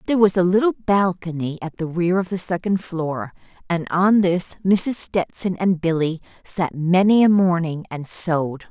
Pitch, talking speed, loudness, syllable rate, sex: 180 Hz, 170 wpm, -20 LUFS, 4.5 syllables/s, female